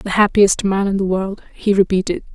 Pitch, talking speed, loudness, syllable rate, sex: 195 Hz, 205 wpm, -17 LUFS, 5.2 syllables/s, female